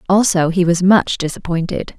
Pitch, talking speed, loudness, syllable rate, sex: 180 Hz, 150 wpm, -16 LUFS, 5.0 syllables/s, female